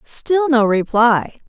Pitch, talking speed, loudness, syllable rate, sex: 250 Hz, 120 wpm, -15 LUFS, 3.2 syllables/s, female